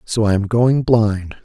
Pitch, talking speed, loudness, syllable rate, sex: 110 Hz, 210 wpm, -16 LUFS, 3.9 syllables/s, male